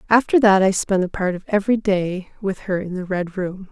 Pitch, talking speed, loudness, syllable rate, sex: 195 Hz, 240 wpm, -20 LUFS, 5.3 syllables/s, female